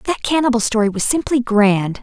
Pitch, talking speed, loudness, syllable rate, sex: 235 Hz, 180 wpm, -16 LUFS, 5.4 syllables/s, female